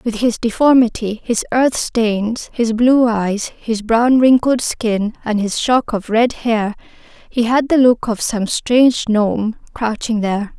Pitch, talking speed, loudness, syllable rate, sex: 230 Hz, 165 wpm, -16 LUFS, 3.9 syllables/s, female